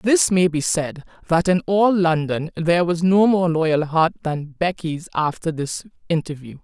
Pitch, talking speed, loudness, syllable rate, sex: 170 Hz, 170 wpm, -20 LUFS, 4.3 syllables/s, female